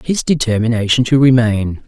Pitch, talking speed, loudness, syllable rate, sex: 120 Hz, 130 wpm, -14 LUFS, 5.0 syllables/s, male